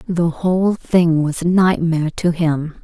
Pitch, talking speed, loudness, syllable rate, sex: 170 Hz, 170 wpm, -17 LUFS, 4.1 syllables/s, female